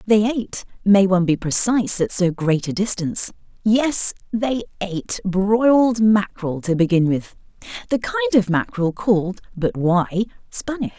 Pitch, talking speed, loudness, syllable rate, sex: 205 Hz, 140 wpm, -19 LUFS, 3.7 syllables/s, female